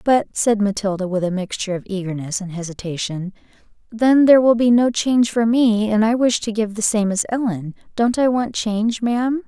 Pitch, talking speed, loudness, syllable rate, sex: 215 Hz, 205 wpm, -18 LUFS, 5.4 syllables/s, female